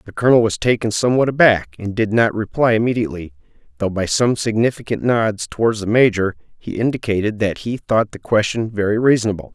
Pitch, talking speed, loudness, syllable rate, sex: 110 Hz, 175 wpm, -18 LUFS, 6.0 syllables/s, male